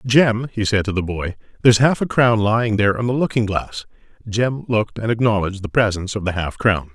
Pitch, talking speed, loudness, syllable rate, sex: 110 Hz, 225 wpm, -19 LUFS, 6.0 syllables/s, male